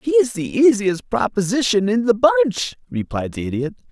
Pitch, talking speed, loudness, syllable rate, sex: 210 Hz, 155 wpm, -19 LUFS, 4.5 syllables/s, male